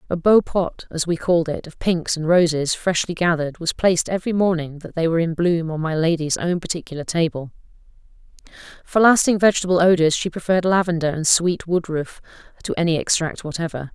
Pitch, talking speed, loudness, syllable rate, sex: 170 Hz, 180 wpm, -20 LUFS, 5.8 syllables/s, female